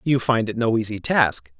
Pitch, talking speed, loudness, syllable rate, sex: 115 Hz, 225 wpm, -21 LUFS, 4.8 syllables/s, male